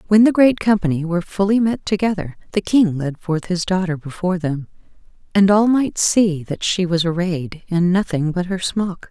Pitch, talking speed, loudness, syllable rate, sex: 185 Hz, 190 wpm, -18 LUFS, 5.0 syllables/s, female